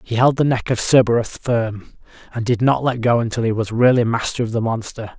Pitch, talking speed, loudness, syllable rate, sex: 115 Hz, 230 wpm, -18 LUFS, 5.6 syllables/s, male